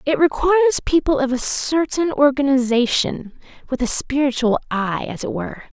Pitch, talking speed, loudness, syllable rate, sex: 275 Hz, 135 wpm, -18 LUFS, 4.9 syllables/s, female